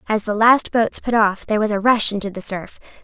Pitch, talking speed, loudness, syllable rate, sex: 215 Hz, 255 wpm, -18 LUFS, 5.7 syllables/s, female